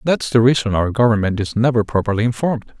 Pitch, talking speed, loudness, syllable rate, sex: 115 Hz, 195 wpm, -17 LUFS, 6.4 syllables/s, male